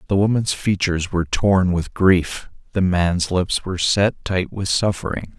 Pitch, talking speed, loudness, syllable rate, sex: 95 Hz, 165 wpm, -19 LUFS, 4.5 syllables/s, male